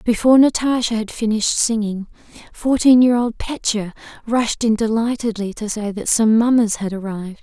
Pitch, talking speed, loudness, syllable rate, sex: 225 Hz, 155 wpm, -18 LUFS, 5.2 syllables/s, female